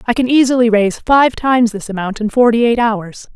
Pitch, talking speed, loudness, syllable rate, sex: 230 Hz, 215 wpm, -13 LUFS, 5.7 syllables/s, female